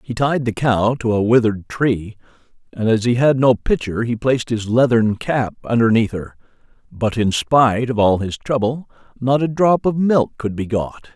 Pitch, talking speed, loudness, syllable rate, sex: 120 Hz, 195 wpm, -18 LUFS, 4.8 syllables/s, male